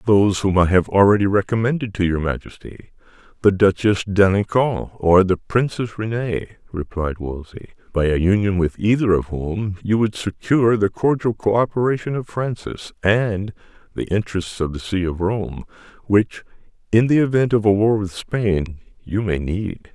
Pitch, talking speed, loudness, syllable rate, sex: 100 Hz, 160 wpm, -19 LUFS, 4.9 syllables/s, male